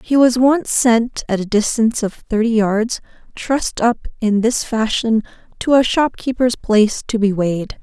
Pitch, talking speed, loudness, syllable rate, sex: 230 Hz, 160 wpm, -17 LUFS, 4.4 syllables/s, female